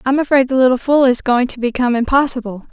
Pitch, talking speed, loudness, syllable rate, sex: 255 Hz, 220 wpm, -15 LUFS, 6.6 syllables/s, female